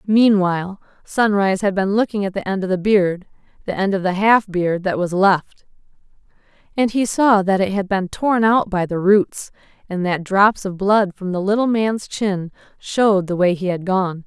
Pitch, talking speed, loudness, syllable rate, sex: 195 Hz, 200 wpm, -18 LUFS, 4.7 syllables/s, female